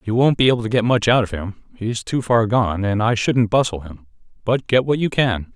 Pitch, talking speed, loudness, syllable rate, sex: 115 Hz, 250 wpm, -19 LUFS, 5.4 syllables/s, male